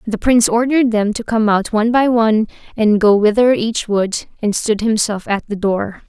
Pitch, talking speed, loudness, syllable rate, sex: 220 Hz, 205 wpm, -15 LUFS, 5.2 syllables/s, female